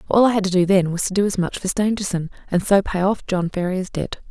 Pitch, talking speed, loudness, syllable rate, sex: 190 Hz, 280 wpm, -20 LUFS, 6.0 syllables/s, female